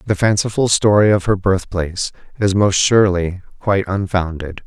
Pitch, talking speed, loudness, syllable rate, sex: 95 Hz, 140 wpm, -16 LUFS, 5.2 syllables/s, male